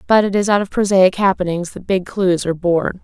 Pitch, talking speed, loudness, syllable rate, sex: 190 Hz, 235 wpm, -16 LUFS, 5.6 syllables/s, female